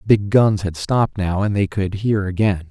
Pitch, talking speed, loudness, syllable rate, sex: 100 Hz, 245 wpm, -19 LUFS, 5.0 syllables/s, male